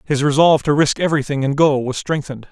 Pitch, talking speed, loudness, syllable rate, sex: 145 Hz, 215 wpm, -17 LUFS, 6.6 syllables/s, male